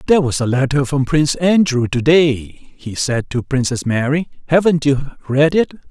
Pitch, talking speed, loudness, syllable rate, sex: 145 Hz, 175 wpm, -16 LUFS, 4.8 syllables/s, male